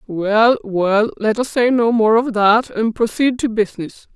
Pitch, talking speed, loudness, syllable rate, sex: 220 Hz, 190 wpm, -16 LUFS, 4.2 syllables/s, female